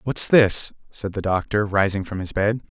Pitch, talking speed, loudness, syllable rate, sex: 100 Hz, 195 wpm, -21 LUFS, 4.7 syllables/s, male